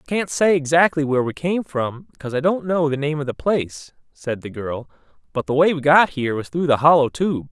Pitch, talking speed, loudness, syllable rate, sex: 145 Hz, 250 wpm, -20 LUFS, 5.7 syllables/s, male